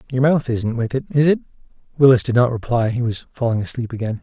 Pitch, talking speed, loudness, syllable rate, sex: 120 Hz, 225 wpm, -19 LUFS, 6.3 syllables/s, male